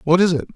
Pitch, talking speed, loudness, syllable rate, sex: 170 Hz, 325 wpm, -17 LUFS, 7.3 syllables/s, male